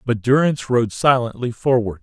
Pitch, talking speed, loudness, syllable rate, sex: 120 Hz, 150 wpm, -18 LUFS, 5.2 syllables/s, male